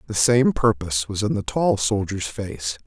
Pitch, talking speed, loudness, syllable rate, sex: 100 Hz, 190 wpm, -22 LUFS, 4.6 syllables/s, male